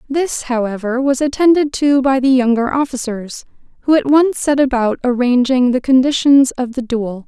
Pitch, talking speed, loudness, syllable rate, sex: 260 Hz, 165 wpm, -15 LUFS, 4.9 syllables/s, female